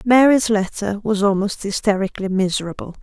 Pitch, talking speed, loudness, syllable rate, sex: 205 Hz, 120 wpm, -19 LUFS, 5.6 syllables/s, female